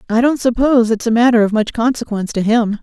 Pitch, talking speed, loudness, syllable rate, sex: 230 Hz, 235 wpm, -15 LUFS, 6.5 syllables/s, female